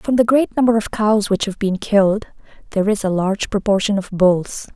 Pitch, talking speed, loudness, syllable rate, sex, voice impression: 205 Hz, 215 wpm, -17 LUFS, 5.5 syllables/s, female, feminine, slightly young, slightly weak, bright, soft, fluent, raspy, slightly cute, calm, friendly, reassuring, slightly elegant, kind, slightly modest